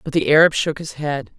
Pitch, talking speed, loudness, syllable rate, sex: 150 Hz, 260 wpm, -18 LUFS, 5.6 syllables/s, female